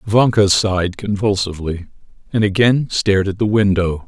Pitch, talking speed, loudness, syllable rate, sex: 100 Hz, 135 wpm, -16 LUFS, 5.1 syllables/s, male